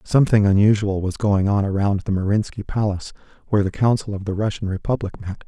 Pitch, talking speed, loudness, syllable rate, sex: 100 Hz, 185 wpm, -20 LUFS, 6.3 syllables/s, male